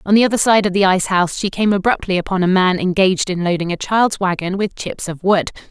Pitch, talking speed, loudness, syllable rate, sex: 190 Hz, 250 wpm, -16 LUFS, 6.3 syllables/s, female